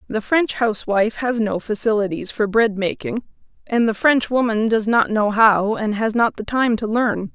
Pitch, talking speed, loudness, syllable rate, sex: 220 Hz, 195 wpm, -19 LUFS, 4.7 syllables/s, female